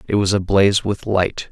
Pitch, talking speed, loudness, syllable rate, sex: 100 Hz, 200 wpm, -18 LUFS, 5.3 syllables/s, male